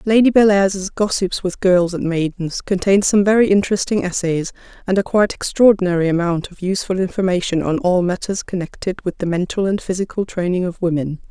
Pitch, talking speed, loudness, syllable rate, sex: 185 Hz, 170 wpm, -18 LUFS, 5.7 syllables/s, female